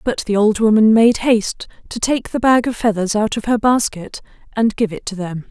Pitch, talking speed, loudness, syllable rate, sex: 220 Hz, 230 wpm, -16 LUFS, 5.1 syllables/s, female